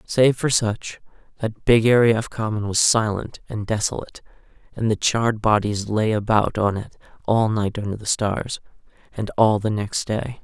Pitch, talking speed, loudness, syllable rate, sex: 110 Hz, 175 wpm, -21 LUFS, 4.7 syllables/s, male